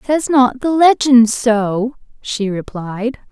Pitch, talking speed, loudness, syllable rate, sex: 240 Hz, 125 wpm, -15 LUFS, 3.1 syllables/s, female